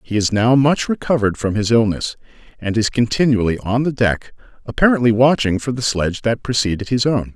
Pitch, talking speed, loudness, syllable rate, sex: 115 Hz, 190 wpm, -17 LUFS, 5.7 syllables/s, male